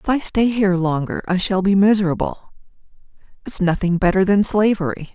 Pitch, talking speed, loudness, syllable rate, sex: 190 Hz, 175 wpm, -18 LUFS, 6.1 syllables/s, female